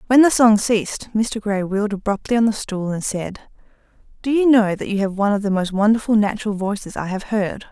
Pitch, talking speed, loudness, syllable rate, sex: 210 Hz, 225 wpm, -19 LUFS, 5.8 syllables/s, female